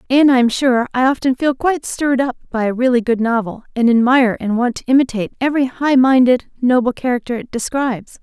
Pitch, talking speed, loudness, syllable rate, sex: 250 Hz, 205 wpm, -16 LUFS, 6.2 syllables/s, female